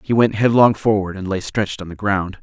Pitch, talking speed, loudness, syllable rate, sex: 100 Hz, 245 wpm, -18 LUFS, 5.6 syllables/s, male